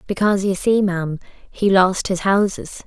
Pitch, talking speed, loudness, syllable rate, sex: 190 Hz, 165 wpm, -18 LUFS, 4.6 syllables/s, female